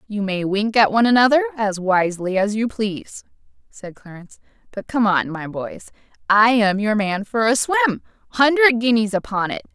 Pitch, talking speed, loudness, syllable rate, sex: 220 Hz, 165 wpm, -18 LUFS, 5.1 syllables/s, female